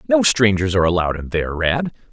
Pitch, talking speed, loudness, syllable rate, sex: 100 Hz, 200 wpm, -18 LUFS, 6.6 syllables/s, male